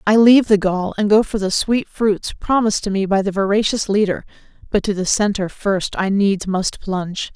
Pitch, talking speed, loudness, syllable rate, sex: 200 Hz, 210 wpm, -18 LUFS, 5.1 syllables/s, female